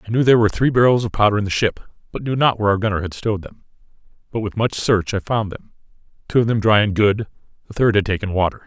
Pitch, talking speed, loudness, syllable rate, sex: 105 Hz, 265 wpm, -18 LUFS, 7.1 syllables/s, male